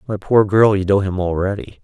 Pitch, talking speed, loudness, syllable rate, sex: 100 Hz, 230 wpm, -16 LUFS, 5.4 syllables/s, male